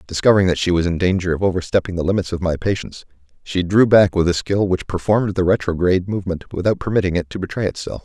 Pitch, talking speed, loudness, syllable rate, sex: 90 Hz, 225 wpm, -18 LUFS, 6.9 syllables/s, male